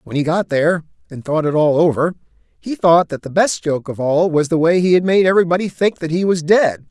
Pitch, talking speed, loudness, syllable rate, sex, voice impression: 165 Hz, 250 wpm, -16 LUFS, 5.7 syllables/s, male, masculine, very adult-like, slightly clear, refreshing, slightly sincere